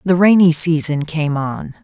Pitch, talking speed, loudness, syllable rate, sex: 160 Hz, 165 wpm, -15 LUFS, 4.2 syllables/s, female